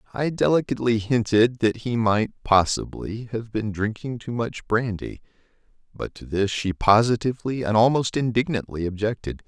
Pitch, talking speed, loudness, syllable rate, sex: 110 Hz, 140 wpm, -23 LUFS, 4.9 syllables/s, male